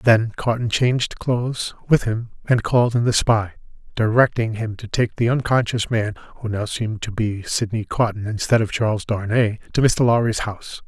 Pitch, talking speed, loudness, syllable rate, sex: 115 Hz, 180 wpm, -20 LUFS, 5.1 syllables/s, male